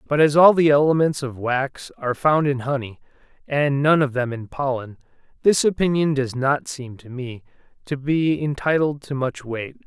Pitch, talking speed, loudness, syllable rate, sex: 140 Hz, 180 wpm, -21 LUFS, 4.8 syllables/s, male